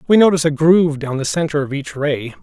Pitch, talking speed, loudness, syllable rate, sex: 150 Hz, 250 wpm, -16 LUFS, 6.4 syllables/s, male